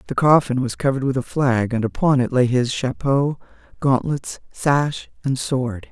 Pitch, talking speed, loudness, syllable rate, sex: 130 Hz, 175 wpm, -20 LUFS, 4.6 syllables/s, female